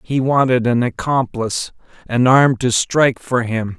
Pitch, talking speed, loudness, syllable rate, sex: 125 Hz, 145 wpm, -16 LUFS, 4.5 syllables/s, male